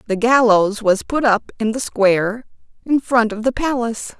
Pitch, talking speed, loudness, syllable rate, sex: 230 Hz, 185 wpm, -17 LUFS, 4.8 syllables/s, female